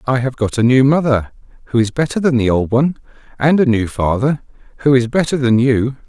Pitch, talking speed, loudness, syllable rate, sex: 130 Hz, 215 wpm, -15 LUFS, 5.8 syllables/s, male